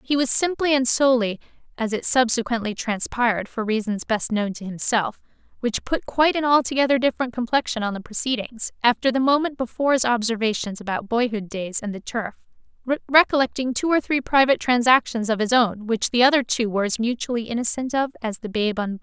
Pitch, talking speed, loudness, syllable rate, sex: 240 Hz, 185 wpm, -22 LUFS, 5.8 syllables/s, female